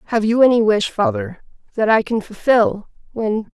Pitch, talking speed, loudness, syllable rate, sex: 220 Hz, 150 wpm, -17 LUFS, 4.9 syllables/s, female